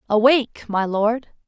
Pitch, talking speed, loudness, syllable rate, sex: 225 Hz, 120 wpm, -20 LUFS, 4.4 syllables/s, female